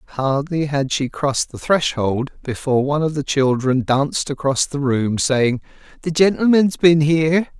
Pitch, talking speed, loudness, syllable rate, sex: 145 Hz, 160 wpm, -18 LUFS, 4.8 syllables/s, male